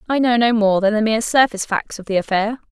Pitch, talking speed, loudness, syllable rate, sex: 220 Hz, 265 wpm, -17 LUFS, 6.5 syllables/s, female